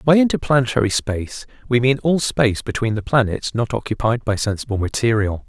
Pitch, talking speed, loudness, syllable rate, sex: 120 Hz, 165 wpm, -19 LUFS, 5.8 syllables/s, male